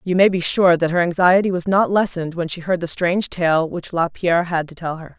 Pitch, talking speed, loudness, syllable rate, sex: 175 Hz, 255 wpm, -18 LUFS, 5.7 syllables/s, female